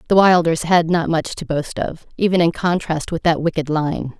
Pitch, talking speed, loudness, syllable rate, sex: 165 Hz, 215 wpm, -18 LUFS, 4.9 syllables/s, female